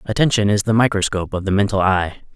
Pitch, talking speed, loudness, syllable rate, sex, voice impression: 100 Hz, 205 wpm, -18 LUFS, 6.5 syllables/s, male, masculine, adult-like, tensed, slightly powerful, hard, clear, fluent, cool, intellectual, slightly refreshing, friendly, wild, lively, slightly light